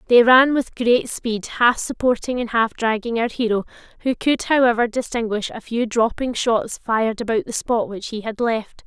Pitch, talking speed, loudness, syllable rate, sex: 230 Hz, 190 wpm, -20 LUFS, 4.8 syllables/s, female